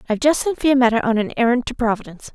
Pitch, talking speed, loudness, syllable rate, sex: 240 Hz, 255 wpm, -18 LUFS, 7.5 syllables/s, female